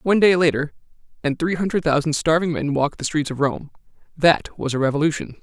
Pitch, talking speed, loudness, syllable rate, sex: 155 Hz, 200 wpm, -20 LUFS, 6.3 syllables/s, male